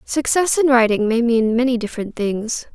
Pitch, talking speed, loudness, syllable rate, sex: 240 Hz, 175 wpm, -18 LUFS, 5.0 syllables/s, female